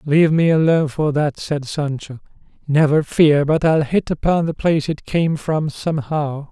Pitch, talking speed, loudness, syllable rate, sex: 155 Hz, 175 wpm, -18 LUFS, 4.7 syllables/s, male